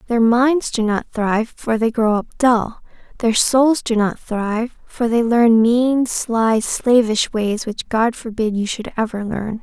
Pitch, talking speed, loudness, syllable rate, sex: 230 Hz, 180 wpm, -18 LUFS, 3.9 syllables/s, female